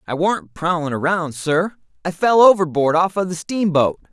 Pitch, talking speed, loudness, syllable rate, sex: 170 Hz, 175 wpm, -18 LUFS, 4.8 syllables/s, male